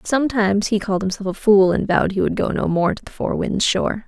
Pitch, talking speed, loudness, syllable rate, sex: 205 Hz, 265 wpm, -19 LUFS, 6.3 syllables/s, female